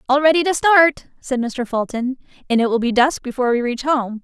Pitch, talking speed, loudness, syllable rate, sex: 260 Hz, 225 wpm, -18 LUFS, 5.5 syllables/s, female